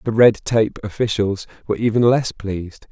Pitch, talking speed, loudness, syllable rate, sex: 110 Hz, 165 wpm, -19 LUFS, 5.2 syllables/s, male